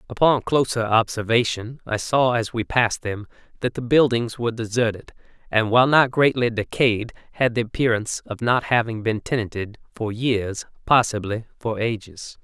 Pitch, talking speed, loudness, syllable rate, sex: 115 Hz, 155 wpm, -21 LUFS, 5.0 syllables/s, male